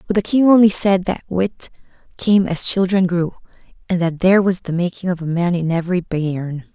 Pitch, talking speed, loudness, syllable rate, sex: 180 Hz, 205 wpm, -17 LUFS, 5.3 syllables/s, female